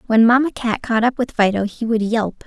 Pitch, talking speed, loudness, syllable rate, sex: 230 Hz, 245 wpm, -18 LUFS, 5.2 syllables/s, female